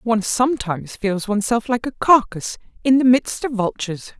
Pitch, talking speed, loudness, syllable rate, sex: 225 Hz, 170 wpm, -19 LUFS, 5.8 syllables/s, female